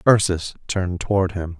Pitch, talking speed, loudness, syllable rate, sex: 90 Hz, 150 wpm, -22 LUFS, 5.5 syllables/s, male